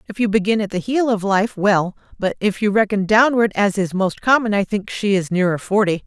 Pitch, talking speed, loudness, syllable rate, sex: 205 Hz, 235 wpm, -18 LUFS, 5.4 syllables/s, female